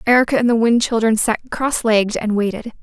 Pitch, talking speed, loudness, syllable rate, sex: 225 Hz, 210 wpm, -17 LUFS, 5.3 syllables/s, female